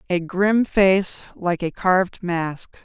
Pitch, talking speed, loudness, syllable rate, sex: 185 Hz, 150 wpm, -20 LUFS, 3.4 syllables/s, female